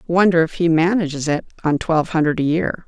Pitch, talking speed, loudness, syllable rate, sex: 165 Hz, 210 wpm, -18 LUFS, 5.9 syllables/s, female